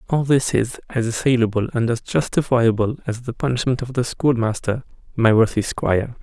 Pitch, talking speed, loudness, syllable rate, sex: 120 Hz, 165 wpm, -20 LUFS, 5.3 syllables/s, male